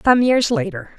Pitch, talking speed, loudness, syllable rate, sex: 240 Hz, 185 wpm, -17 LUFS, 4.5 syllables/s, female